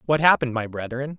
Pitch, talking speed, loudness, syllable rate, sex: 135 Hz, 200 wpm, -22 LUFS, 6.7 syllables/s, male